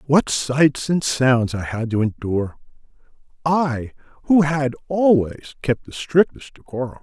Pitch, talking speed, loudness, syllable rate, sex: 135 Hz, 130 wpm, -20 LUFS, 4.2 syllables/s, male